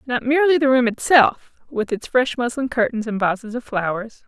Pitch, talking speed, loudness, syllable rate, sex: 240 Hz, 195 wpm, -19 LUFS, 5.3 syllables/s, female